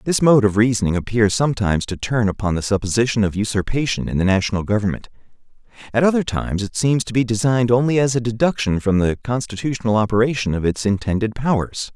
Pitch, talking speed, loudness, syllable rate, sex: 115 Hz, 185 wpm, -19 LUFS, 6.5 syllables/s, male